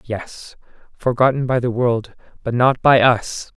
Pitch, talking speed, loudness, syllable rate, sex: 125 Hz, 150 wpm, -18 LUFS, 3.9 syllables/s, male